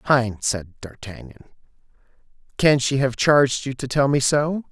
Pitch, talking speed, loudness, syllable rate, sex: 130 Hz, 155 wpm, -20 LUFS, 4.6 syllables/s, male